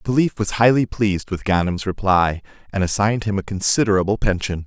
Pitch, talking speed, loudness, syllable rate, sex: 100 Hz, 180 wpm, -19 LUFS, 6.1 syllables/s, male